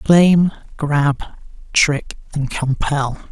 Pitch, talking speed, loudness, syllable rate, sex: 150 Hz, 90 wpm, -18 LUFS, 2.3 syllables/s, male